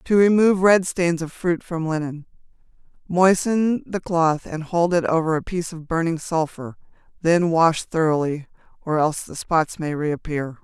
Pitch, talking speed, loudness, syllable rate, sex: 165 Hz, 160 wpm, -21 LUFS, 4.6 syllables/s, female